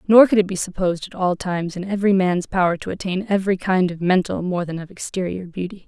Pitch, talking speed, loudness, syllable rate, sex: 185 Hz, 235 wpm, -21 LUFS, 6.3 syllables/s, female